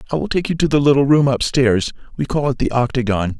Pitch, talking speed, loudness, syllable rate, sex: 135 Hz, 245 wpm, -17 LUFS, 6.2 syllables/s, male